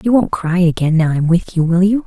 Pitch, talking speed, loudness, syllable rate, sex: 180 Hz, 290 wpm, -15 LUFS, 5.6 syllables/s, female